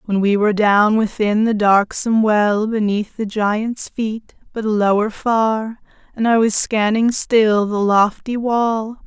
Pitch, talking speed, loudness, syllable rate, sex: 215 Hz, 150 wpm, -17 LUFS, 3.7 syllables/s, female